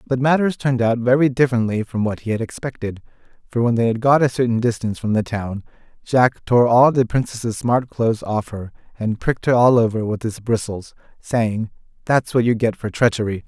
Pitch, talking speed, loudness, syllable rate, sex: 115 Hz, 205 wpm, -19 LUFS, 5.5 syllables/s, male